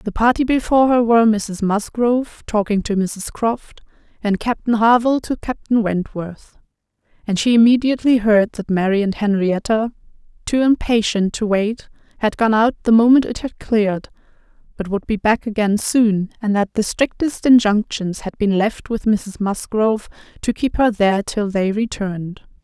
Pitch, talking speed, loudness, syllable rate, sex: 220 Hz, 160 wpm, -18 LUFS, 4.9 syllables/s, female